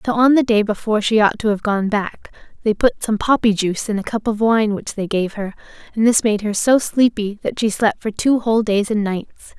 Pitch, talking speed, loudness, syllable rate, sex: 215 Hz, 250 wpm, -18 LUFS, 5.5 syllables/s, female